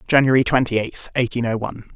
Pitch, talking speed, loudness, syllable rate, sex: 120 Hz, 185 wpm, -20 LUFS, 6.7 syllables/s, male